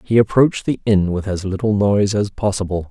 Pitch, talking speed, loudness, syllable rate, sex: 100 Hz, 205 wpm, -18 LUFS, 5.8 syllables/s, male